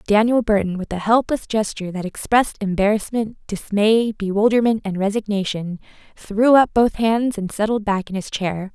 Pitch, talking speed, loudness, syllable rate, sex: 210 Hz, 160 wpm, -19 LUFS, 5.1 syllables/s, female